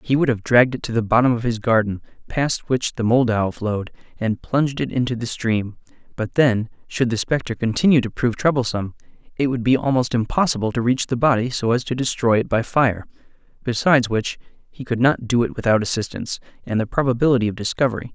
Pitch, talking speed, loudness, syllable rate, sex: 120 Hz, 200 wpm, -20 LUFS, 6.1 syllables/s, male